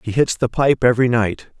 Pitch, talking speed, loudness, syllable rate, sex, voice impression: 120 Hz, 225 wpm, -17 LUFS, 5.5 syllables/s, male, masculine, adult-like, slightly thick, cool, slightly intellectual, sincere